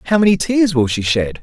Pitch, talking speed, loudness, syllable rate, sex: 145 Hz, 255 wpm, -15 LUFS, 5.8 syllables/s, male